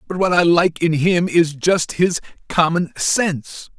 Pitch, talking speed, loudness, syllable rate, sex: 170 Hz, 175 wpm, -17 LUFS, 4.0 syllables/s, male